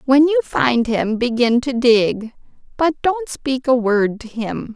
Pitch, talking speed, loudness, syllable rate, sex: 250 Hz, 175 wpm, -17 LUFS, 3.6 syllables/s, female